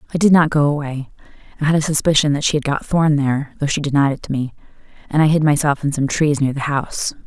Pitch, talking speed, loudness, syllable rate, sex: 145 Hz, 255 wpm, -17 LUFS, 6.6 syllables/s, female